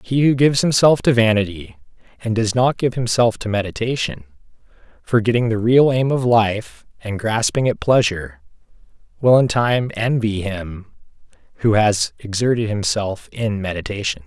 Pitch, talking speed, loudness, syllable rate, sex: 110 Hz, 145 wpm, -18 LUFS, 4.9 syllables/s, male